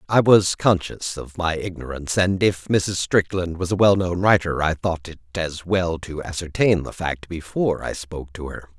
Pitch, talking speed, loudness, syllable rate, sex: 90 Hz, 190 wpm, -21 LUFS, 4.8 syllables/s, male